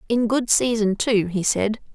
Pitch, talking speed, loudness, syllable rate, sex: 220 Hz, 185 wpm, -21 LUFS, 4.2 syllables/s, female